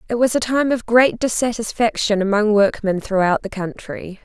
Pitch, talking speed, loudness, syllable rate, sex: 220 Hz, 170 wpm, -18 LUFS, 4.9 syllables/s, female